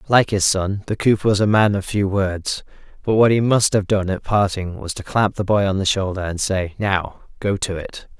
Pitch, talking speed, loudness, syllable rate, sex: 100 Hz, 240 wpm, -19 LUFS, 4.9 syllables/s, male